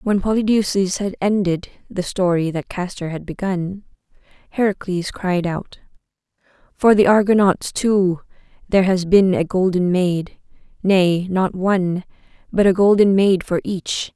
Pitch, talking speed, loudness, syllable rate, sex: 190 Hz, 130 wpm, -18 LUFS, 4.3 syllables/s, female